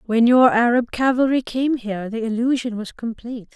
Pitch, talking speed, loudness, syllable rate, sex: 235 Hz, 170 wpm, -19 LUFS, 5.4 syllables/s, female